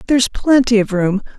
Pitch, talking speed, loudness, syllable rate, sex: 225 Hz, 175 wpm, -15 LUFS, 5.6 syllables/s, female